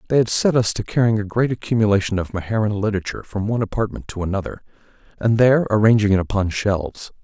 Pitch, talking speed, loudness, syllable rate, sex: 105 Hz, 190 wpm, -19 LUFS, 7.0 syllables/s, male